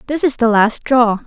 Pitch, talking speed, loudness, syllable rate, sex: 245 Hz, 235 wpm, -14 LUFS, 4.6 syllables/s, female